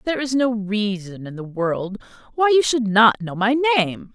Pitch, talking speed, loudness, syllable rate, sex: 225 Hz, 205 wpm, -19 LUFS, 4.7 syllables/s, female